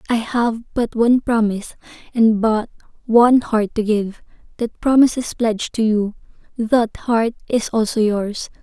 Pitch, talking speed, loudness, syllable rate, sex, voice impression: 225 Hz, 155 wpm, -18 LUFS, 4.5 syllables/s, female, very feminine, young, very thin, very relaxed, very weak, very dark, very soft, muffled, halting, slightly raspy, very cute, intellectual, slightly refreshing, very sincere, very calm, very friendly, very reassuring, very unique, very elegant, slightly wild, very sweet, slightly lively, very kind, very modest